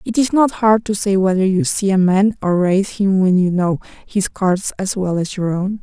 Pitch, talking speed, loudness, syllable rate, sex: 195 Hz, 245 wpm, -16 LUFS, 4.8 syllables/s, female